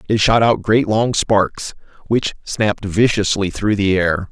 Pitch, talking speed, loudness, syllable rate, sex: 105 Hz, 165 wpm, -17 LUFS, 4.1 syllables/s, male